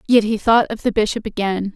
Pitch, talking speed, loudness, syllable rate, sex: 215 Hz, 240 wpm, -18 LUFS, 5.7 syllables/s, female